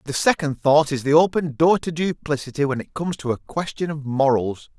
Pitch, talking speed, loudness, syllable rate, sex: 150 Hz, 215 wpm, -21 LUFS, 5.5 syllables/s, male